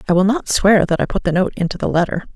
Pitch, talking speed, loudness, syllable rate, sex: 190 Hz, 305 wpm, -17 LUFS, 6.7 syllables/s, female